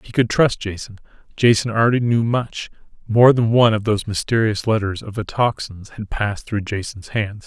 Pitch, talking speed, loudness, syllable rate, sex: 110 Hz, 175 wpm, -19 LUFS, 5.3 syllables/s, male